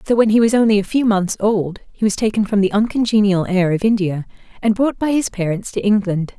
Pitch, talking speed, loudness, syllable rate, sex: 205 Hz, 235 wpm, -17 LUFS, 5.8 syllables/s, female